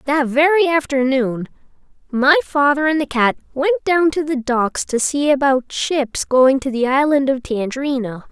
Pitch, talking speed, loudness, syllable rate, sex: 275 Hz, 165 wpm, -17 LUFS, 4.5 syllables/s, female